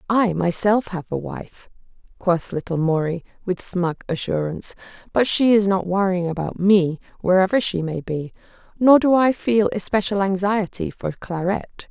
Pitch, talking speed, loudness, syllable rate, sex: 185 Hz, 150 wpm, -21 LUFS, 4.7 syllables/s, female